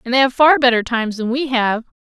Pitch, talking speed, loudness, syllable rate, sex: 250 Hz, 265 wpm, -16 LUFS, 6.2 syllables/s, female